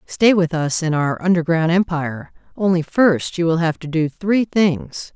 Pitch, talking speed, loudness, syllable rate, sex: 170 Hz, 185 wpm, -18 LUFS, 4.4 syllables/s, female